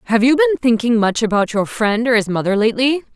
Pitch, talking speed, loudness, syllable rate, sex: 235 Hz, 230 wpm, -16 LUFS, 6.6 syllables/s, female